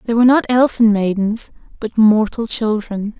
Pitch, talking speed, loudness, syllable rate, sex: 220 Hz, 150 wpm, -15 LUFS, 4.7 syllables/s, female